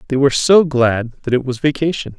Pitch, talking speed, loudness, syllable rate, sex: 135 Hz, 220 wpm, -15 LUFS, 5.6 syllables/s, male